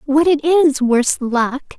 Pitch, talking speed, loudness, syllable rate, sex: 285 Hz, 170 wpm, -15 LUFS, 4.0 syllables/s, female